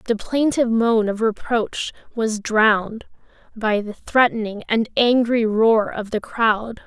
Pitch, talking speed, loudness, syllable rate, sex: 225 Hz, 140 wpm, -20 LUFS, 3.9 syllables/s, female